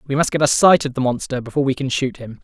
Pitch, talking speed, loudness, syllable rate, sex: 135 Hz, 320 wpm, -18 LUFS, 7.1 syllables/s, male